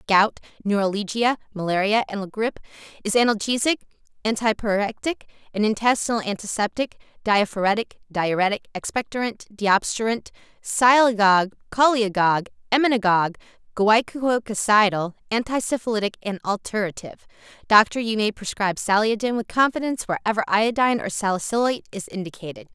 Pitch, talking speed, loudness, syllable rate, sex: 215 Hz, 100 wpm, -22 LUFS, 5.9 syllables/s, female